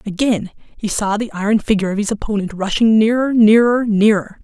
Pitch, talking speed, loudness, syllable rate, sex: 215 Hz, 175 wpm, -16 LUFS, 5.7 syllables/s, female